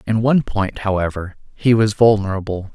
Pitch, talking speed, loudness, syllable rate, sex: 105 Hz, 155 wpm, -18 LUFS, 5.4 syllables/s, male